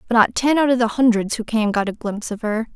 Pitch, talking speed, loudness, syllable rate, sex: 225 Hz, 305 wpm, -19 LUFS, 6.3 syllables/s, female